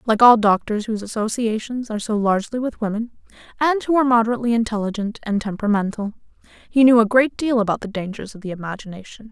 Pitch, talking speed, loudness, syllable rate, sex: 220 Hz, 180 wpm, -20 LUFS, 6.7 syllables/s, female